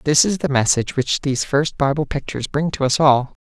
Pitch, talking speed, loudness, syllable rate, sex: 140 Hz, 225 wpm, -19 LUFS, 5.9 syllables/s, male